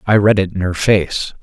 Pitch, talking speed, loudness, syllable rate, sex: 95 Hz, 255 wpm, -15 LUFS, 4.9 syllables/s, male